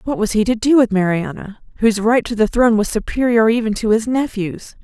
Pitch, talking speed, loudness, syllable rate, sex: 220 Hz, 225 wpm, -16 LUFS, 5.8 syllables/s, female